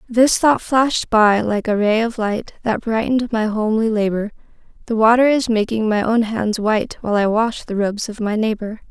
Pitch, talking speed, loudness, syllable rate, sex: 220 Hz, 200 wpm, -18 LUFS, 5.3 syllables/s, female